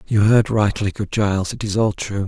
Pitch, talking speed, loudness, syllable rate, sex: 105 Hz, 235 wpm, -19 LUFS, 5.2 syllables/s, male